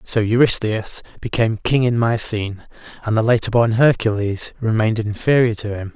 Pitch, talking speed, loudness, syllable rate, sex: 110 Hz, 150 wpm, -18 LUFS, 5.4 syllables/s, male